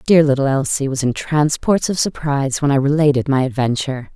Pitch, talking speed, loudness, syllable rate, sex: 140 Hz, 190 wpm, -17 LUFS, 5.7 syllables/s, female